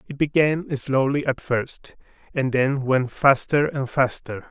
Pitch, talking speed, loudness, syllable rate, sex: 135 Hz, 145 wpm, -22 LUFS, 3.8 syllables/s, male